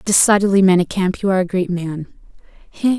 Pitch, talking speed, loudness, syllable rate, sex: 190 Hz, 140 wpm, -16 LUFS, 6.2 syllables/s, female